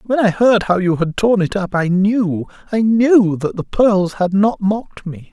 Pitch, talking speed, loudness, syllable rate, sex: 195 Hz, 225 wpm, -16 LUFS, 4.2 syllables/s, male